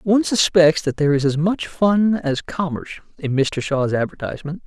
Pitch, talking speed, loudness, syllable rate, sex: 165 Hz, 180 wpm, -19 LUFS, 5.3 syllables/s, male